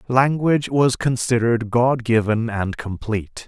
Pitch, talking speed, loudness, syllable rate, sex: 120 Hz, 120 wpm, -20 LUFS, 4.5 syllables/s, male